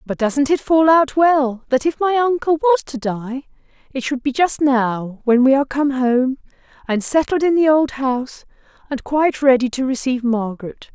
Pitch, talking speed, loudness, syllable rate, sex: 270 Hz, 190 wpm, -17 LUFS, 4.9 syllables/s, female